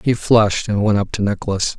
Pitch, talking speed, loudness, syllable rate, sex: 105 Hz, 235 wpm, -17 LUFS, 5.9 syllables/s, male